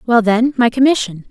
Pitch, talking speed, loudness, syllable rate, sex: 235 Hz, 140 wpm, -14 LUFS, 5.2 syllables/s, female